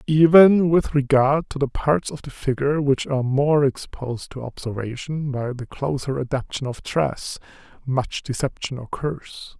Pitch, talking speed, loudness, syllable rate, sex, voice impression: 140 Hz, 150 wpm, -21 LUFS, 4.6 syllables/s, male, very masculine, very adult-like, old, very thick, slightly relaxed, slightly weak, slightly dark, soft, slightly muffled, slightly halting, slightly cool, intellectual, sincere, very calm, very mature, friendly, reassuring, elegant, slightly lively, kind, slightly modest